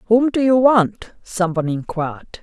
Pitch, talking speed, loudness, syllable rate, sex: 200 Hz, 150 wpm, -18 LUFS, 4.3 syllables/s, female